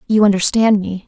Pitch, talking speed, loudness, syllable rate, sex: 205 Hz, 170 wpm, -14 LUFS, 5.6 syllables/s, female